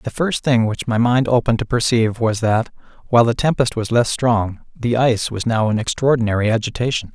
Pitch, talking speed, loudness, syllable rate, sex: 115 Hz, 200 wpm, -18 LUFS, 5.8 syllables/s, male